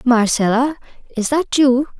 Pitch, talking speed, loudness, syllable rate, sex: 255 Hz, 120 wpm, -16 LUFS, 4.3 syllables/s, female